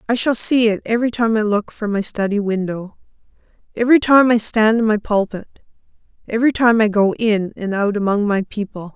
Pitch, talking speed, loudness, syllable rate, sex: 215 Hz, 180 wpm, -17 LUFS, 5.5 syllables/s, female